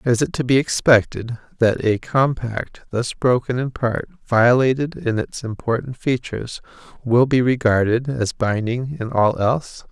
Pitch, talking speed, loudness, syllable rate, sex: 125 Hz, 150 wpm, -20 LUFS, 4.4 syllables/s, male